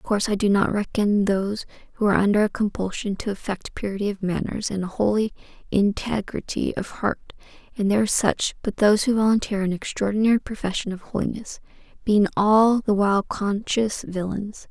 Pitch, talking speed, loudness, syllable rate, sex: 205 Hz, 160 wpm, -23 LUFS, 5.6 syllables/s, female